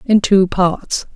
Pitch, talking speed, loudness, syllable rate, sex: 190 Hz, 155 wpm, -15 LUFS, 3.0 syllables/s, female